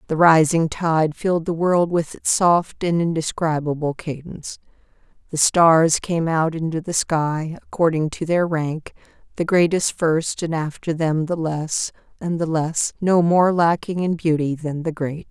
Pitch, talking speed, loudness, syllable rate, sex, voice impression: 160 Hz, 160 wpm, -20 LUFS, 4.2 syllables/s, female, feminine, middle-aged, tensed, powerful, hard, clear, slightly raspy, intellectual, calm, slightly reassuring, slightly strict, slightly sharp